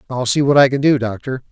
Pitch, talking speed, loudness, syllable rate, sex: 130 Hz, 275 wpm, -15 LUFS, 6.4 syllables/s, male